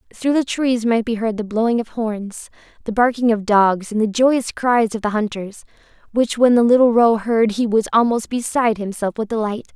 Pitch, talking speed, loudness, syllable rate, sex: 225 Hz, 210 wpm, -18 LUFS, 5.0 syllables/s, female